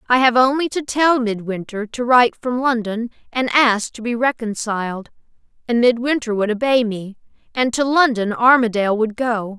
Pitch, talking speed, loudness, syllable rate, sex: 235 Hz, 155 wpm, -18 LUFS, 5.0 syllables/s, female